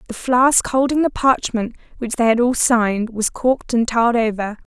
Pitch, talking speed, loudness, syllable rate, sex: 235 Hz, 190 wpm, -17 LUFS, 5.1 syllables/s, female